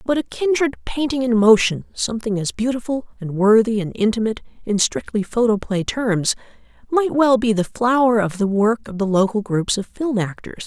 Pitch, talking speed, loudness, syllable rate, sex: 225 Hz, 180 wpm, -19 LUFS, 5.1 syllables/s, female